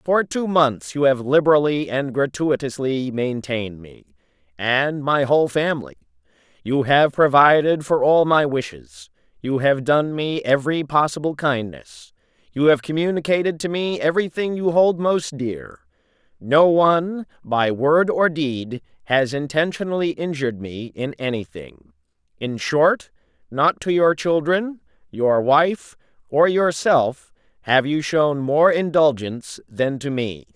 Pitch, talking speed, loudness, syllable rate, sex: 145 Hz, 135 wpm, -19 LUFS, 4.2 syllables/s, male